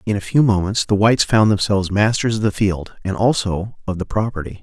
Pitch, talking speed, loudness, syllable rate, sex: 100 Hz, 220 wpm, -18 LUFS, 5.8 syllables/s, male